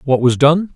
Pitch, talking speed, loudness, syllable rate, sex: 145 Hz, 240 wpm, -13 LUFS, 4.6 syllables/s, male